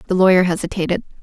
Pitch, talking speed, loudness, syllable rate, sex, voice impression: 180 Hz, 145 wpm, -17 LUFS, 8.0 syllables/s, female, feminine, gender-neutral, slightly young, slightly adult-like, thin, slightly tensed, slightly weak, slightly bright, slightly hard, clear, fluent, slightly cute, cool, intellectual, refreshing, slightly sincere, friendly, slightly reassuring, very unique, slightly wild, slightly lively, slightly strict, slightly intense